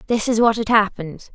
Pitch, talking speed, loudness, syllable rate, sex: 215 Hz, 225 wpm, -18 LUFS, 6.0 syllables/s, female